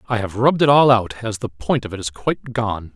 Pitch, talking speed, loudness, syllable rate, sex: 115 Hz, 285 wpm, -19 LUFS, 5.8 syllables/s, male